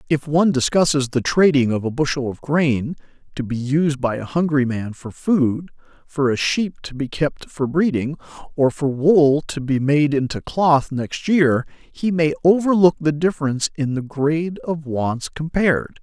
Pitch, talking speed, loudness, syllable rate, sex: 145 Hz, 180 wpm, -19 LUFS, 4.5 syllables/s, male